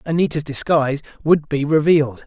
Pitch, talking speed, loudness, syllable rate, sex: 150 Hz, 130 wpm, -18 LUFS, 5.7 syllables/s, male